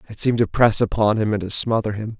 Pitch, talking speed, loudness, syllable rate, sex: 110 Hz, 275 wpm, -19 LUFS, 6.5 syllables/s, male